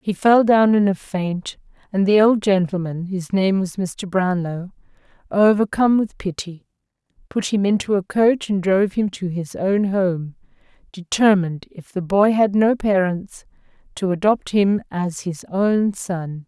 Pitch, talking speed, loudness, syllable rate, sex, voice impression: 190 Hz, 160 wpm, -19 LUFS, 4.3 syllables/s, female, very feminine, young, thin, slightly tensed, slightly weak, bright, soft, clear, fluent, cute, slightly cool, intellectual, refreshing, sincere, very calm, very friendly, very reassuring, unique, very elegant, wild, slightly sweet, lively, kind, slightly modest, light